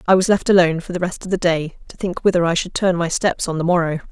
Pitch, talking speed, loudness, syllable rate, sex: 175 Hz, 305 wpm, -18 LUFS, 6.6 syllables/s, female